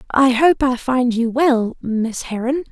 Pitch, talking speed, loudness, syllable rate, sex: 250 Hz, 175 wpm, -17 LUFS, 3.8 syllables/s, female